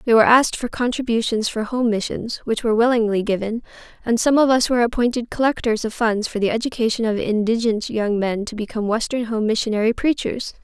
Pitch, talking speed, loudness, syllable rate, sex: 230 Hz, 190 wpm, -20 LUFS, 6.1 syllables/s, female